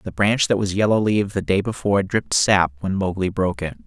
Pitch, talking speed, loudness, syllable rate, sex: 95 Hz, 235 wpm, -20 LUFS, 6.1 syllables/s, male